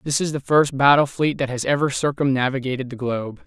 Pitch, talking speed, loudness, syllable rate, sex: 135 Hz, 210 wpm, -20 LUFS, 6.0 syllables/s, male